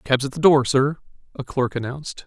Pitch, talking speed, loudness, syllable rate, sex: 135 Hz, 210 wpm, -20 LUFS, 5.5 syllables/s, male